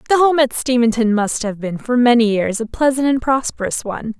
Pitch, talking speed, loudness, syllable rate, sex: 240 Hz, 215 wpm, -17 LUFS, 5.5 syllables/s, female